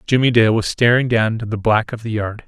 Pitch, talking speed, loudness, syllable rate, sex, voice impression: 115 Hz, 265 wpm, -17 LUFS, 6.0 syllables/s, male, masculine, middle-aged, slightly relaxed, powerful, hard, slightly muffled, raspy, cool, calm, mature, friendly, wild, lively, slightly kind